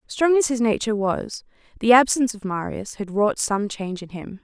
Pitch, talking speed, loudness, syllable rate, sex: 220 Hz, 205 wpm, -21 LUFS, 5.3 syllables/s, female